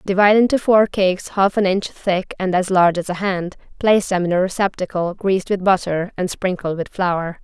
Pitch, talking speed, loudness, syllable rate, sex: 185 Hz, 210 wpm, -18 LUFS, 5.4 syllables/s, female